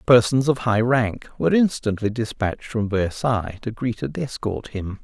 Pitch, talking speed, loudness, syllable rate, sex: 115 Hz, 165 wpm, -22 LUFS, 4.9 syllables/s, male